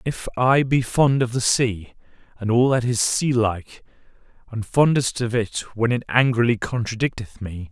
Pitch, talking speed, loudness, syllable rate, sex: 120 Hz, 165 wpm, -21 LUFS, 4.8 syllables/s, male